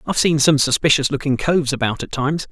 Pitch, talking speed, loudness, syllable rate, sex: 140 Hz, 215 wpm, -17 LUFS, 6.7 syllables/s, male